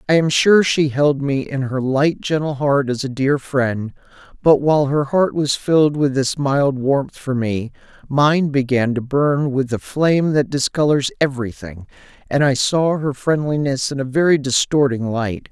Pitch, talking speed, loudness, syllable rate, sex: 140 Hz, 180 wpm, -18 LUFS, 4.4 syllables/s, male